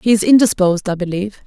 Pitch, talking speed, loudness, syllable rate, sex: 200 Hz, 205 wpm, -15 LUFS, 7.0 syllables/s, female